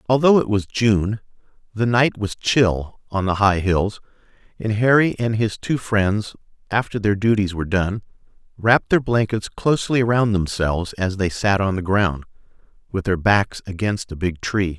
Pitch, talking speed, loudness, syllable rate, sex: 105 Hz, 170 wpm, -20 LUFS, 4.7 syllables/s, male